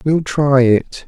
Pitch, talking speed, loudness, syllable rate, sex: 135 Hz, 165 wpm, -14 LUFS, 3.1 syllables/s, male